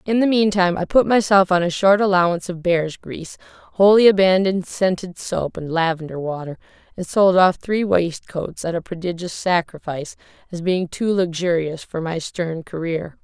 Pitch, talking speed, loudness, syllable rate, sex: 180 Hz, 170 wpm, -19 LUFS, 5.1 syllables/s, female